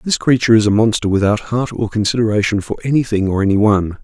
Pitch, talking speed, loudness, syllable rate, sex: 110 Hz, 195 wpm, -15 LUFS, 6.5 syllables/s, male